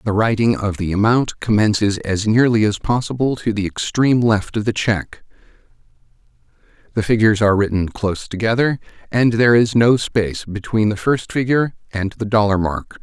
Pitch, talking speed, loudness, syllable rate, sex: 110 Hz, 165 wpm, -17 LUFS, 5.5 syllables/s, male